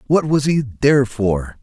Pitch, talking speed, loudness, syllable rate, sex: 125 Hz, 185 wpm, -17 LUFS, 4.1 syllables/s, male